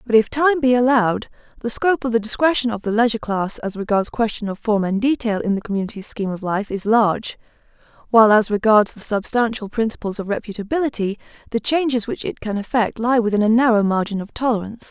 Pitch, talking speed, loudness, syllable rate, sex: 220 Hz, 200 wpm, -19 LUFS, 6.3 syllables/s, female